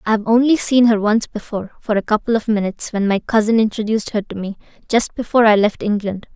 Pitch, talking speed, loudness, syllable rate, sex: 215 Hz, 225 wpm, -17 LUFS, 6.4 syllables/s, female